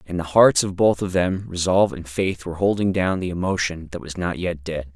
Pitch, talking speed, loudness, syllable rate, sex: 90 Hz, 240 wpm, -21 LUFS, 5.5 syllables/s, male